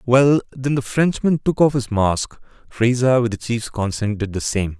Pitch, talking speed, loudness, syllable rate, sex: 120 Hz, 200 wpm, -19 LUFS, 4.8 syllables/s, male